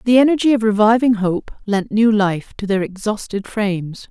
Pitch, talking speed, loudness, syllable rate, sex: 210 Hz, 175 wpm, -17 LUFS, 4.9 syllables/s, female